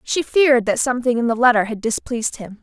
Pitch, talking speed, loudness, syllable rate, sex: 240 Hz, 230 wpm, -18 LUFS, 6.3 syllables/s, female